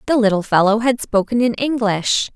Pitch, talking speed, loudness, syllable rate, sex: 220 Hz, 180 wpm, -17 LUFS, 5.1 syllables/s, female